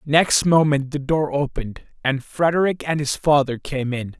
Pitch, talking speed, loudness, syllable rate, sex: 145 Hz, 170 wpm, -20 LUFS, 4.6 syllables/s, male